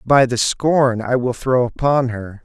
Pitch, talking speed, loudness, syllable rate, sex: 125 Hz, 195 wpm, -17 LUFS, 3.9 syllables/s, male